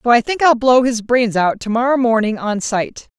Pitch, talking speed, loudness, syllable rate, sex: 235 Hz, 225 wpm, -15 LUFS, 4.9 syllables/s, female